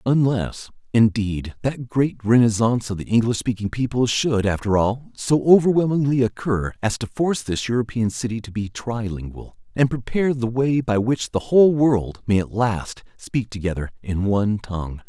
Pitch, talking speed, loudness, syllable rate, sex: 115 Hz, 170 wpm, -21 LUFS, 4.9 syllables/s, male